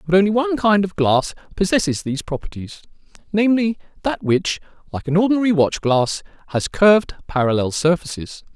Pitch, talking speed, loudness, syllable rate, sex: 180 Hz, 145 wpm, -19 LUFS, 5.7 syllables/s, male